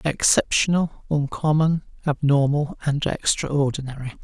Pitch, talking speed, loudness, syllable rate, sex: 145 Hz, 70 wpm, -22 LUFS, 4.2 syllables/s, male